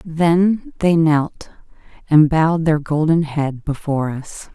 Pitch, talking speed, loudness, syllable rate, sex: 160 Hz, 130 wpm, -17 LUFS, 3.7 syllables/s, female